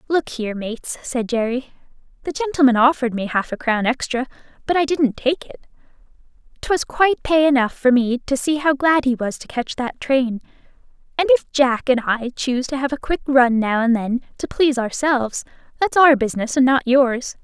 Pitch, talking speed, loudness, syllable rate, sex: 260 Hz, 195 wpm, -19 LUFS, 5.3 syllables/s, female